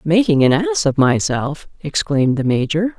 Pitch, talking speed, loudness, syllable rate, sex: 165 Hz, 160 wpm, -17 LUFS, 4.7 syllables/s, female